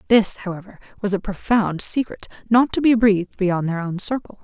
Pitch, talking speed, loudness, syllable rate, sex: 205 Hz, 190 wpm, -20 LUFS, 5.3 syllables/s, female